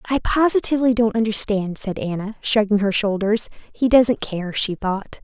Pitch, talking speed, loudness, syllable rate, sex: 215 Hz, 150 wpm, -20 LUFS, 4.8 syllables/s, female